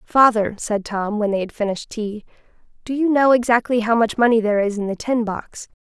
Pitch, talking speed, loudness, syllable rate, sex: 220 Hz, 215 wpm, -19 LUFS, 5.6 syllables/s, female